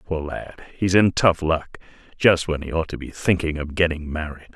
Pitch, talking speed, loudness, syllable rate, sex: 80 Hz, 195 wpm, -22 LUFS, 5.3 syllables/s, male